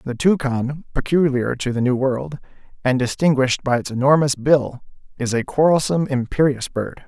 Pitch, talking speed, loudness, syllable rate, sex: 135 Hz, 155 wpm, -19 LUFS, 5.0 syllables/s, male